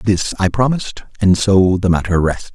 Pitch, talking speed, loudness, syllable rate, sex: 100 Hz, 190 wpm, -15 LUFS, 5.0 syllables/s, male